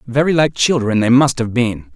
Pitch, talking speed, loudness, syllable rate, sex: 125 Hz, 215 wpm, -15 LUFS, 4.9 syllables/s, male